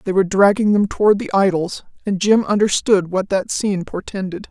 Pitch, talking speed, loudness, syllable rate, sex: 195 Hz, 185 wpm, -17 LUFS, 5.5 syllables/s, female